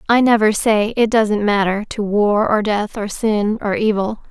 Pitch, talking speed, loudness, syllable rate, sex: 210 Hz, 195 wpm, -17 LUFS, 4.3 syllables/s, female